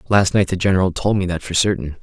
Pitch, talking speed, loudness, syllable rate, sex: 95 Hz, 265 wpm, -18 LUFS, 6.6 syllables/s, male